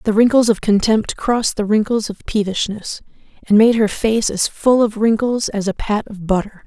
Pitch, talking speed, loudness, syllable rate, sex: 215 Hz, 200 wpm, -17 LUFS, 5.0 syllables/s, female